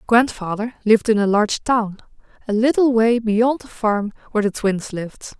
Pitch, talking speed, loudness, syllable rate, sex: 220 Hz, 180 wpm, -19 LUFS, 5.1 syllables/s, female